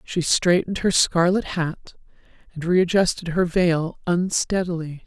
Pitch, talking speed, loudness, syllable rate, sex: 175 Hz, 120 wpm, -21 LUFS, 4.2 syllables/s, female